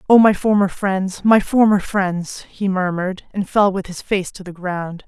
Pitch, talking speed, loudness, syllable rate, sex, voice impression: 190 Hz, 200 wpm, -18 LUFS, 4.4 syllables/s, female, feminine, adult-like, bright, clear, fluent, intellectual, slightly friendly, elegant, slightly strict, slightly sharp